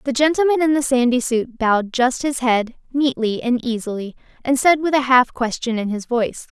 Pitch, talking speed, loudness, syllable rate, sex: 250 Hz, 210 wpm, -19 LUFS, 5.4 syllables/s, female